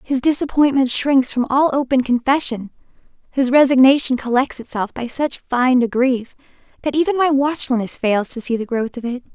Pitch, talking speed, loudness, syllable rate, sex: 260 Hz, 165 wpm, -18 LUFS, 5.0 syllables/s, female